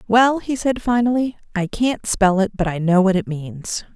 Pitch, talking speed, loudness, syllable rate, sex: 205 Hz, 210 wpm, -19 LUFS, 4.5 syllables/s, female